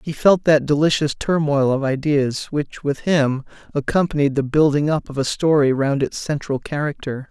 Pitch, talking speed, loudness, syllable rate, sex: 145 Hz, 175 wpm, -19 LUFS, 4.8 syllables/s, male